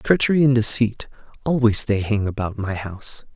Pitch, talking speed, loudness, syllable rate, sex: 115 Hz, 145 wpm, -21 LUFS, 5.2 syllables/s, male